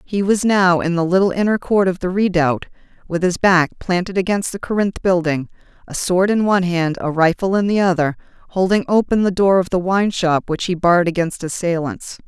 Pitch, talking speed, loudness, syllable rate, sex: 180 Hz, 205 wpm, -17 LUFS, 5.5 syllables/s, female